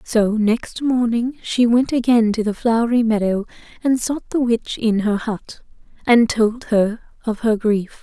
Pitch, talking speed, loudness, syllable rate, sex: 230 Hz, 170 wpm, -19 LUFS, 4.1 syllables/s, female